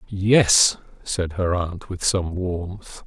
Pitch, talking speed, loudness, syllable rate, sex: 90 Hz, 135 wpm, -21 LUFS, 2.6 syllables/s, male